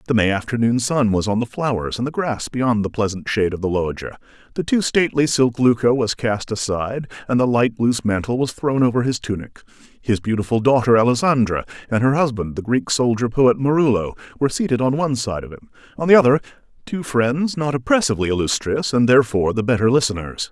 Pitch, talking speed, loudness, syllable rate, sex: 120 Hz, 200 wpm, -19 LUFS, 6.1 syllables/s, male